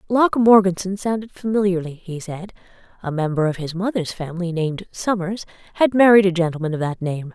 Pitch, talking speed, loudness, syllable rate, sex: 185 Hz, 170 wpm, -20 LUFS, 5.9 syllables/s, female